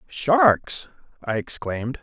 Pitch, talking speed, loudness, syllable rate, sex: 140 Hz, 90 wpm, -22 LUFS, 3.3 syllables/s, male